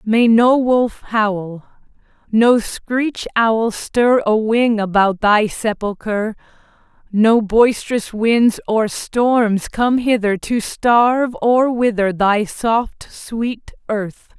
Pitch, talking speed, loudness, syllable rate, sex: 225 Hz, 115 wpm, -16 LUFS, 3.2 syllables/s, female